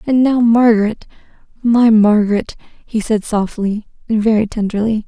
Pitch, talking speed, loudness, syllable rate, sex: 220 Hz, 120 wpm, -14 LUFS, 4.7 syllables/s, female